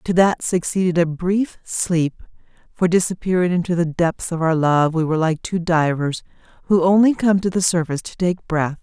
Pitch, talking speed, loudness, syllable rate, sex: 175 Hz, 190 wpm, -19 LUFS, 5.0 syllables/s, female